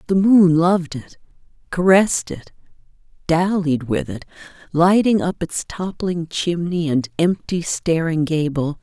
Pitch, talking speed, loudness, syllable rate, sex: 170 Hz, 130 wpm, -18 LUFS, 4.4 syllables/s, female